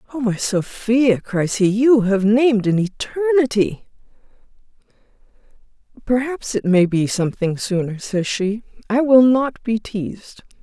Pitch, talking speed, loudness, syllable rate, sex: 220 Hz, 125 wpm, -18 LUFS, 4.2 syllables/s, female